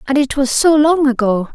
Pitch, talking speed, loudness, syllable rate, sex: 270 Hz, 235 wpm, -14 LUFS, 5.2 syllables/s, female